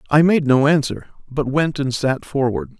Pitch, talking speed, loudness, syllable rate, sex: 145 Hz, 195 wpm, -18 LUFS, 4.7 syllables/s, male